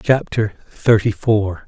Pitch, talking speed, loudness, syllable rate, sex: 105 Hz, 110 wpm, -18 LUFS, 3.6 syllables/s, male